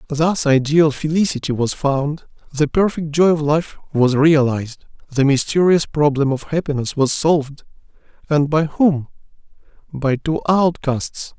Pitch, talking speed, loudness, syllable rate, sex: 150 Hz, 130 wpm, -17 LUFS, 4.4 syllables/s, male